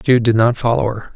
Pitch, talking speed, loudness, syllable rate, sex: 115 Hz, 260 wpm, -16 LUFS, 5.4 syllables/s, male